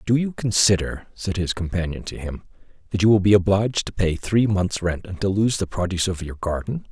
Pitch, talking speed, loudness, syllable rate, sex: 95 Hz, 225 wpm, -22 LUFS, 5.6 syllables/s, male